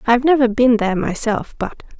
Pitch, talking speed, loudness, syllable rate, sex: 235 Hz, 180 wpm, -17 LUFS, 6.4 syllables/s, female